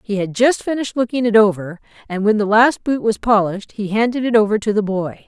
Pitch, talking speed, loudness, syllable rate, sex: 215 Hz, 240 wpm, -17 LUFS, 6.0 syllables/s, female